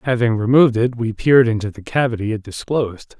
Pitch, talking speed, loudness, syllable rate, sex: 115 Hz, 190 wpm, -17 LUFS, 6.2 syllables/s, male